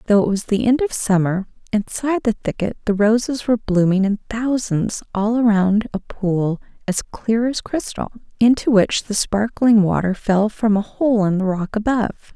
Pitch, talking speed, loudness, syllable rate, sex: 215 Hz, 180 wpm, -19 LUFS, 4.9 syllables/s, female